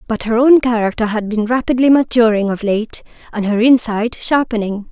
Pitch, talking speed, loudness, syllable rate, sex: 230 Hz, 170 wpm, -15 LUFS, 5.2 syllables/s, female